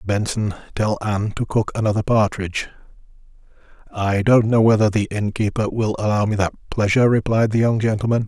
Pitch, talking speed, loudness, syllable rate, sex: 105 Hz, 160 wpm, -19 LUFS, 5.5 syllables/s, male